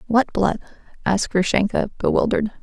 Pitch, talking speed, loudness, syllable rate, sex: 210 Hz, 115 wpm, -21 LUFS, 6.0 syllables/s, female